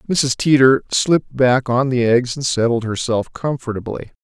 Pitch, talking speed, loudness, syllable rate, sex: 125 Hz, 155 wpm, -17 LUFS, 4.7 syllables/s, male